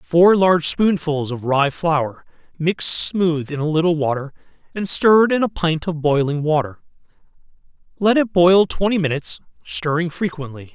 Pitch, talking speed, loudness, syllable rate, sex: 165 Hz, 150 wpm, -18 LUFS, 4.8 syllables/s, male